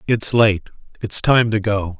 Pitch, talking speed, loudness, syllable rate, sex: 105 Hz, 180 wpm, -17 LUFS, 4.2 syllables/s, male